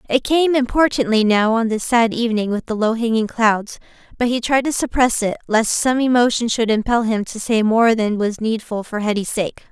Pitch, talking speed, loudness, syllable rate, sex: 230 Hz, 210 wpm, -18 LUFS, 5.4 syllables/s, female